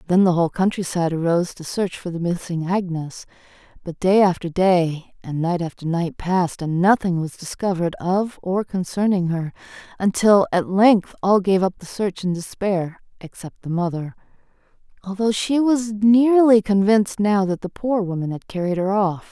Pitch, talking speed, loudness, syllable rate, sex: 185 Hz, 175 wpm, -20 LUFS, 4.9 syllables/s, female